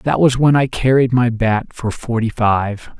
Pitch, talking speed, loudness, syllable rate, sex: 120 Hz, 200 wpm, -16 LUFS, 4.1 syllables/s, male